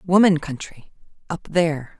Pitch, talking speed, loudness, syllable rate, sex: 165 Hz, 90 wpm, -21 LUFS, 4.5 syllables/s, female